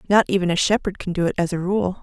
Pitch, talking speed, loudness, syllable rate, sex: 185 Hz, 295 wpm, -21 LUFS, 6.9 syllables/s, female